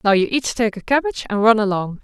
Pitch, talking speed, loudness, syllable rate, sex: 220 Hz, 265 wpm, -18 LUFS, 6.4 syllables/s, female